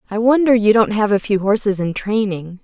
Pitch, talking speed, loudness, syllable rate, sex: 210 Hz, 230 wpm, -16 LUFS, 5.4 syllables/s, female